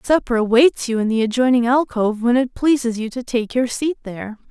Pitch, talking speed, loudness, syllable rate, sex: 245 Hz, 215 wpm, -18 LUFS, 5.7 syllables/s, female